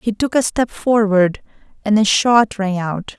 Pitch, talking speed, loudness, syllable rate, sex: 210 Hz, 190 wpm, -16 LUFS, 4.1 syllables/s, female